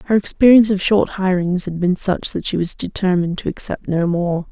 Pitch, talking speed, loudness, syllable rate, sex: 185 Hz, 215 wpm, -17 LUFS, 5.6 syllables/s, female